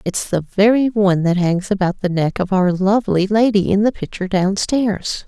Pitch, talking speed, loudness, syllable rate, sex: 200 Hz, 205 wpm, -17 LUFS, 5.0 syllables/s, female